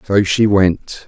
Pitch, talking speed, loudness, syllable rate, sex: 95 Hz, 170 wpm, -14 LUFS, 3.3 syllables/s, male